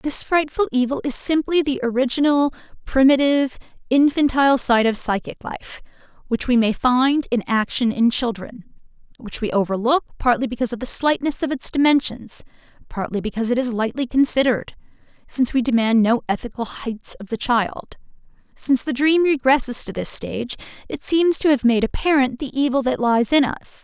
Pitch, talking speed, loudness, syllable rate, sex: 255 Hz, 165 wpm, -20 LUFS, 5.3 syllables/s, female